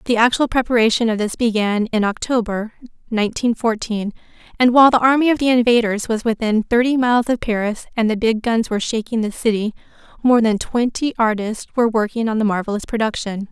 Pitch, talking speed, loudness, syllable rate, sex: 225 Hz, 180 wpm, -18 LUFS, 5.9 syllables/s, female